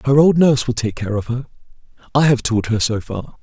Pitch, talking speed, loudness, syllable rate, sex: 125 Hz, 245 wpm, -17 LUFS, 5.7 syllables/s, male